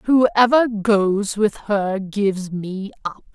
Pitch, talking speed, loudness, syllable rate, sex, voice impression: 205 Hz, 125 wpm, -19 LUFS, 2.9 syllables/s, female, feminine, adult-like, tensed, powerful, bright, halting, friendly, elegant, lively, kind, intense